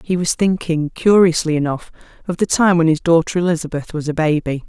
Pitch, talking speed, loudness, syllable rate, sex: 165 Hz, 190 wpm, -17 LUFS, 5.7 syllables/s, female